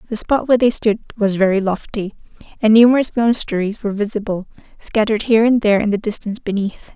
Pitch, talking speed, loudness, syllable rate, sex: 215 Hz, 180 wpm, -17 LUFS, 6.7 syllables/s, female